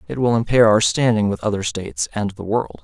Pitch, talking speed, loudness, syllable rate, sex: 100 Hz, 235 wpm, -19 LUFS, 5.7 syllables/s, male